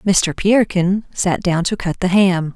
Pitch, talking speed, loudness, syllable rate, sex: 185 Hz, 190 wpm, -17 LUFS, 4.1 syllables/s, female